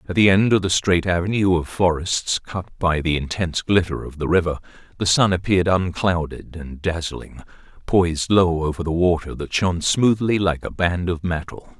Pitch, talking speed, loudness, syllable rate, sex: 90 Hz, 185 wpm, -20 LUFS, 5.1 syllables/s, male